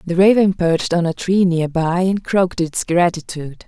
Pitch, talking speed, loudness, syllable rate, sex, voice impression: 175 Hz, 195 wpm, -17 LUFS, 5.0 syllables/s, female, feminine, adult-like, calm, elegant, slightly sweet